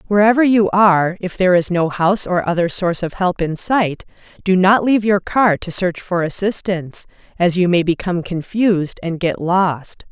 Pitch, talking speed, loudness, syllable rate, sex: 185 Hz, 190 wpm, -16 LUFS, 5.2 syllables/s, female